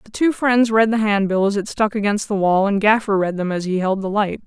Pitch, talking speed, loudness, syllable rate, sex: 205 Hz, 280 wpm, -18 LUFS, 5.6 syllables/s, female